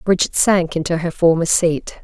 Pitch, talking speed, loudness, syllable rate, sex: 170 Hz, 175 wpm, -17 LUFS, 4.9 syllables/s, female